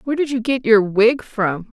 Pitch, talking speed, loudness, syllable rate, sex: 230 Hz, 235 wpm, -17 LUFS, 4.9 syllables/s, female